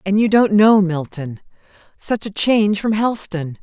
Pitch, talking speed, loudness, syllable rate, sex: 195 Hz, 165 wpm, -16 LUFS, 4.7 syllables/s, female